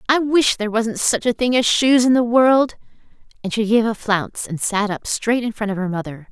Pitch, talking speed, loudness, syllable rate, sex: 225 Hz, 245 wpm, -18 LUFS, 5.3 syllables/s, female